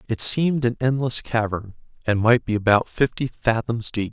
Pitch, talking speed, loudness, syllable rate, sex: 115 Hz, 175 wpm, -21 LUFS, 5.0 syllables/s, male